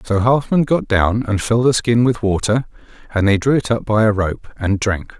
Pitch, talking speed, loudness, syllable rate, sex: 110 Hz, 230 wpm, -17 LUFS, 5.0 syllables/s, male